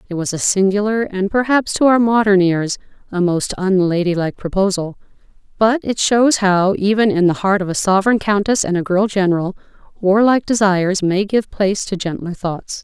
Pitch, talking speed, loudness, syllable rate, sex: 195 Hz, 180 wpm, -16 LUFS, 5.3 syllables/s, female